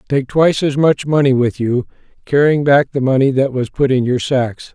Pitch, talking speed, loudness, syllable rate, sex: 135 Hz, 215 wpm, -15 LUFS, 5.1 syllables/s, male